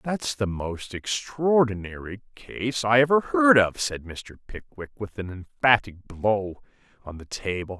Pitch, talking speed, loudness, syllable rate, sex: 110 Hz, 145 wpm, -24 LUFS, 4.1 syllables/s, male